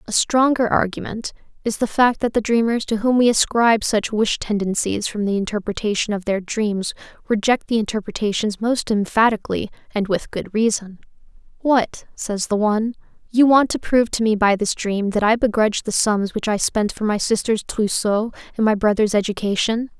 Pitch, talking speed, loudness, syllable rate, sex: 215 Hz, 180 wpm, -20 LUFS, 5.2 syllables/s, female